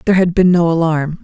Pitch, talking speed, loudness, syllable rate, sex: 170 Hz, 245 wpm, -13 LUFS, 6.4 syllables/s, female